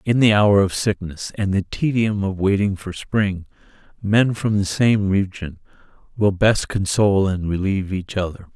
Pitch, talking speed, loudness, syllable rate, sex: 100 Hz, 170 wpm, -20 LUFS, 4.6 syllables/s, male